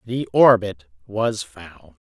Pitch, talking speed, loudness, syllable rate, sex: 105 Hz, 115 wpm, -18 LUFS, 3.6 syllables/s, male